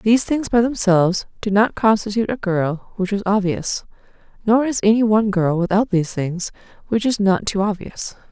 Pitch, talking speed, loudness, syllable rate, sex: 205 Hz, 180 wpm, -19 LUFS, 5.4 syllables/s, female